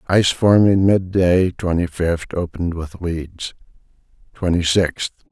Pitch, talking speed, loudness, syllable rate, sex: 90 Hz, 125 wpm, -18 LUFS, 4.2 syllables/s, male